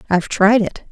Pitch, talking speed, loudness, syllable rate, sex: 205 Hz, 195 wpm, -15 LUFS, 5.7 syllables/s, female